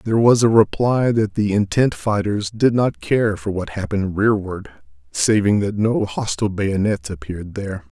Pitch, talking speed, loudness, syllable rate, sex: 100 Hz, 165 wpm, -19 LUFS, 4.8 syllables/s, male